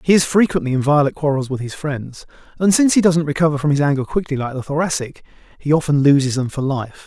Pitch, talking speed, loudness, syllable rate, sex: 145 Hz, 240 wpm, -17 LUFS, 6.5 syllables/s, male